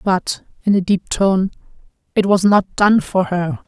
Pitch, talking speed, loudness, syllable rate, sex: 190 Hz, 180 wpm, -17 LUFS, 3.7 syllables/s, female